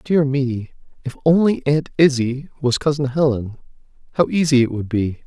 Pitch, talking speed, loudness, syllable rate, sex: 135 Hz, 150 wpm, -19 LUFS, 4.7 syllables/s, male